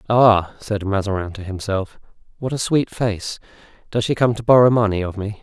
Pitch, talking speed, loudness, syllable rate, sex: 105 Hz, 190 wpm, -19 LUFS, 5.1 syllables/s, male